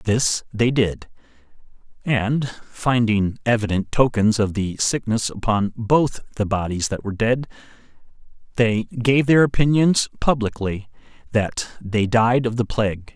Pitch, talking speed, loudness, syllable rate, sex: 115 Hz, 130 wpm, -20 LUFS, 4.1 syllables/s, male